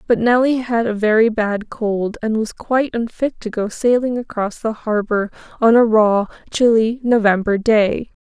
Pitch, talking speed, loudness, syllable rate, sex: 225 Hz, 170 wpm, -17 LUFS, 4.5 syllables/s, female